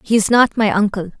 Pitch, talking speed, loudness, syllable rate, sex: 210 Hz, 250 wpm, -15 LUFS, 5.8 syllables/s, female